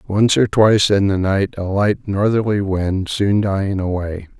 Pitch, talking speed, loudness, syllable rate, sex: 100 Hz, 180 wpm, -17 LUFS, 4.4 syllables/s, male